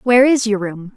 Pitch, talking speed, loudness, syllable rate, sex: 220 Hz, 250 wpm, -15 LUFS, 5.5 syllables/s, female